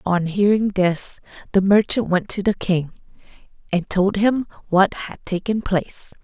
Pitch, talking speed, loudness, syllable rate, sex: 190 Hz, 155 wpm, -20 LUFS, 4.3 syllables/s, female